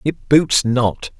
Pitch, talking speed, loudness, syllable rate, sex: 130 Hz, 150 wpm, -16 LUFS, 2.9 syllables/s, male